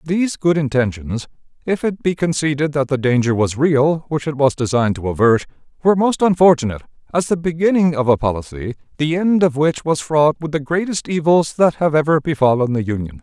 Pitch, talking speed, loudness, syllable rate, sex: 145 Hz, 195 wpm, -17 LUFS, 5.7 syllables/s, male